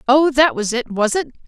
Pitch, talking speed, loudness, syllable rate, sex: 260 Hz, 245 wpm, -17 LUFS, 5.3 syllables/s, female